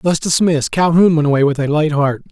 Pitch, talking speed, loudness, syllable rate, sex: 155 Hz, 235 wpm, -14 LUFS, 6.0 syllables/s, male